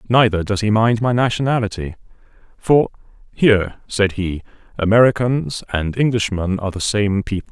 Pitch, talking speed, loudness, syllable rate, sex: 105 Hz, 135 wpm, -18 LUFS, 5.2 syllables/s, male